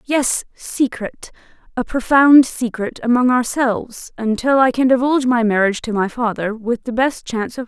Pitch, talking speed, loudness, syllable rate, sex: 245 Hz, 155 wpm, -17 LUFS, 4.9 syllables/s, female